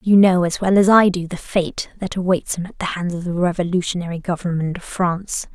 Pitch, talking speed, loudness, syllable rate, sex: 180 Hz, 225 wpm, -19 LUFS, 5.7 syllables/s, female